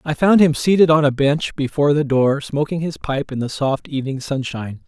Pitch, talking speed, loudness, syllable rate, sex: 145 Hz, 220 wpm, -18 LUFS, 5.5 syllables/s, male